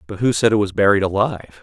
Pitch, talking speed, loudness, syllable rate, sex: 100 Hz, 260 wpm, -17 LUFS, 6.7 syllables/s, male